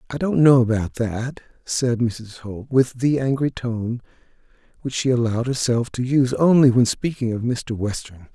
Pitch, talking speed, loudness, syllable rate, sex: 120 Hz, 175 wpm, -20 LUFS, 4.7 syllables/s, male